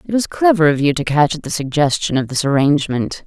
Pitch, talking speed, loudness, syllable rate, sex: 155 Hz, 240 wpm, -16 LUFS, 6.0 syllables/s, female